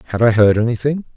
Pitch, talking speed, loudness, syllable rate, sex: 120 Hz, 205 wpm, -15 LUFS, 7.3 syllables/s, male